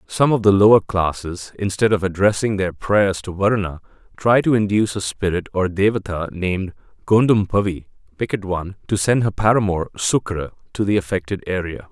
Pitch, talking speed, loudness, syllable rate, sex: 100 Hz, 160 wpm, -19 LUFS, 5.3 syllables/s, male